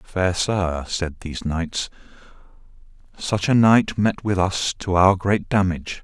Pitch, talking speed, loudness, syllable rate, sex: 95 Hz, 150 wpm, -21 LUFS, 3.9 syllables/s, male